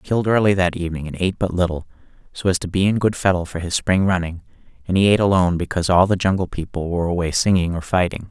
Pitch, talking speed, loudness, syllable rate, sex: 90 Hz, 245 wpm, -19 LUFS, 7.3 syllables/s, male